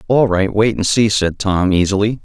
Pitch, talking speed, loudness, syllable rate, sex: 105 Hz, 215 wpm, -15 LUFS, 4.9 syllables/s, male